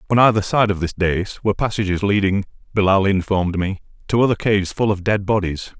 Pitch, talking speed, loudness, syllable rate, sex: 100 Hz, 195 wpm, -19 LUFS, 6.2 syllables/s, male